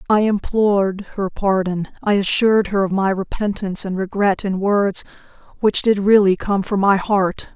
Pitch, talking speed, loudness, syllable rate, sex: 200 Hz, 165 wpm, -18 LUFS, 4.8 syllables/s, female